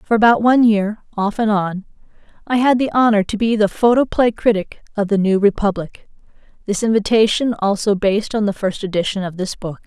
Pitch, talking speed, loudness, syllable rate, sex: 210 Hz, 190 wpm, -17 LUFS, 5.5 syllables/s, female